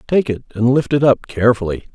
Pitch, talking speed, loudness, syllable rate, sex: 120 Hz, 215 wpm, -16 LUFS, 6.3 syllables/s, male